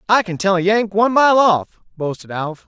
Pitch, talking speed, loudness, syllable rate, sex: 195 Hz, 225 wpm, -16 LUFS, 5.2 syllables/s, male